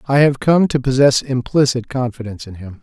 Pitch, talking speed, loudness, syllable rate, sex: 130 Hz, 190 wpm, -16 LUFS, 5.7 syllables/s, male